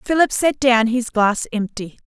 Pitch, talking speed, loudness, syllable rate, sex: 240 Hz, 175 wpm, -18 LUFS, 4.3 syllables/s, female